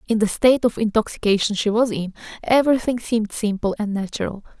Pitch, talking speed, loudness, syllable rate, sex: 220 Hz, 170 wpm, -20 LUFS, 6.3 syllables/s, female